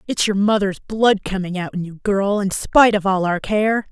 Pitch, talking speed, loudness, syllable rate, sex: 200 Hz, 230 wpm, -18 LUFS, 4.9 syllables/s, female